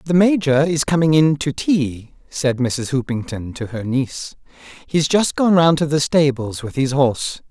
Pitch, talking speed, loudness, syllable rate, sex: 140 Hz, 185 wpm, -18 LUFS, 4.5 syllables/s, male